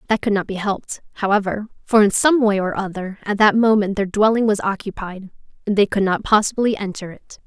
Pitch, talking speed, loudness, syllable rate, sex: 205 Hz, 210 wpm, -18 LUFS, 5.7 syllables/s, female